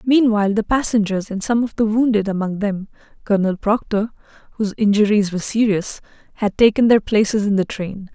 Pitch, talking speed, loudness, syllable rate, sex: 210 Hz, 170 wpm, -18 LUFS, 5.7 syllables/s, female